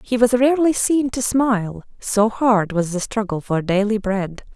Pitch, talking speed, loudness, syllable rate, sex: 220 Hz, 185 wpm, -19 LUFS, 4.6 syllables/s, female